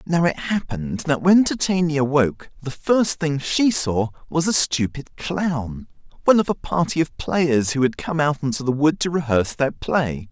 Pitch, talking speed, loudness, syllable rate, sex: 150 Hz, 190 wpm, -20 LUFS, 4.6 syllables/s, male